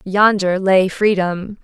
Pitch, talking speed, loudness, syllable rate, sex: 195 Hz, 110 wpm, -16 LUFS, 3.3 syllables/s, female